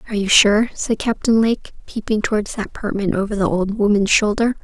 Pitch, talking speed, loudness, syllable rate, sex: 210 Hz, 195 wpm, -18 LUFS, 5.7 syllables/s, female